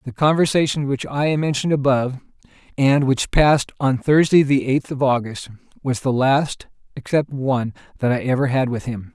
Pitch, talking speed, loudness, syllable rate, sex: 135 Hz, 170 wpm, -19 LUFS, 5.2 syllables/s, male